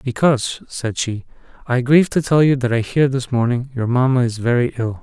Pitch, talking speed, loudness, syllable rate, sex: 125 Hz, 215 wpm, -18 LUFS, 5.5 syllables/s, male